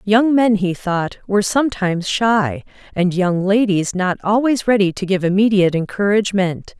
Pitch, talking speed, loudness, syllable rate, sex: 200 Hz, 150 wpm, -17 LUFS, 4.9 syllables/s, female